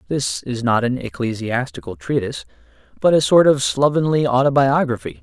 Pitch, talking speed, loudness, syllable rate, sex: 135 Hz, 140 wpm, -18 LUFS, 5.4 syllables/s, male